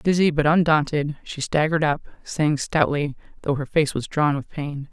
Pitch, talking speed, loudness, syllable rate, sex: 150 Hz, 185 wpm, -22 LUFS, 4.9 syllables/s, female